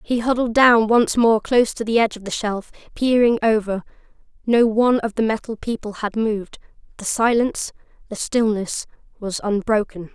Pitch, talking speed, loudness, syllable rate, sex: 220 Hz, 165 wpm, -19 LUFS, 5.3 syllables/s, female